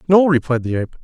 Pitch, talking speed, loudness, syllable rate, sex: 150 Hz, 230 wpm, -17 LUFS, 7.3 syllables/s, male